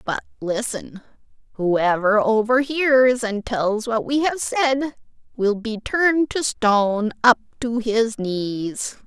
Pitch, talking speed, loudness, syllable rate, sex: 230 Hz, 125 wpm, -20 LUFS, 3.4 syllables/s, female